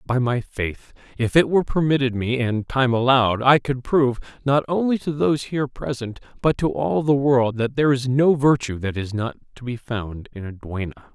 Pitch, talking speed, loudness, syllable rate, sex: 125 Hz, 210 wpm, -21 LUFS, 5.2 syllables/s, male